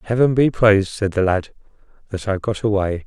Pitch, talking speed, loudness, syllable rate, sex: 105 Hz, 195 wpm, -18 LUFS, 5.5 syllables/s, male